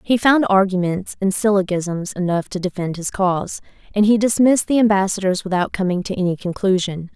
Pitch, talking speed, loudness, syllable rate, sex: 190 Hz, 170 wpm, -18 LUFS, 5.6 syllables/s, female